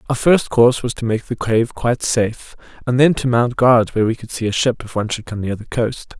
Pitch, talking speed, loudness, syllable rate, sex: 115 Hz, 270 wpm, -17 LUFS, 5.8 syllables/s, male